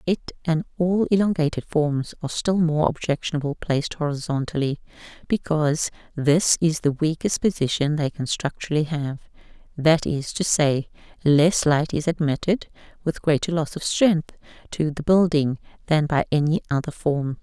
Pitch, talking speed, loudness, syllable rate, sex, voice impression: 155 Hz, 145 wpm, -22 LUFS, 4.8 syllables/s, female, feminine, adult-like, slightly clear, slightly elegant